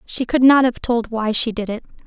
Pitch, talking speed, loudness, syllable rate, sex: 235 Hz, 260 wpm, -18 LUFS, 5.1 syllables/s, female